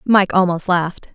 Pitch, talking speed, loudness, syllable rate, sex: 180 Hz, 155 wpm, -17 LUFS, 5.0 syllables/s, female